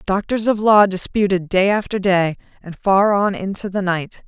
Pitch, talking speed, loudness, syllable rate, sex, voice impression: 195 Hz, 180 wpm, -17 LUFS, 4.6 syllables/s, female, feminine, very adult-like, slightly powerful, intellectual, calm, slightly strict